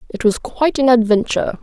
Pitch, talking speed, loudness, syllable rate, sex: 240 Hz, 185 wpm, -16 LUFS, 6.3 syllables/s, female